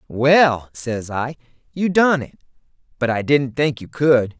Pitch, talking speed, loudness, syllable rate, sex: 135 Hz, 165 wpm, -19 LUFS, 3.7 syllables/s, male